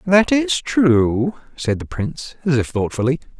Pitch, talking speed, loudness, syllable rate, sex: 150 Hz, 160 wpm, -19 LUFS, 4.2 syllables/s, male